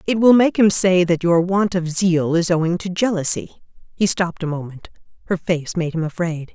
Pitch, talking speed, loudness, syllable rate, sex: 180 Hz, 210 wpm, -18 LUFS, 5.2 syllables/s, female